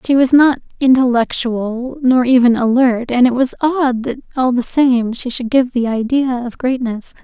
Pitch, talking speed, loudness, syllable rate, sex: 250 Hz, 180 wpm, -15 LUFS, 4.4 syllables/s, female